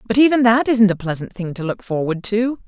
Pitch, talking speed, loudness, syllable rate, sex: 215 Hz, 245 wpm, -18 LUFS, 5.5 syllables/s, female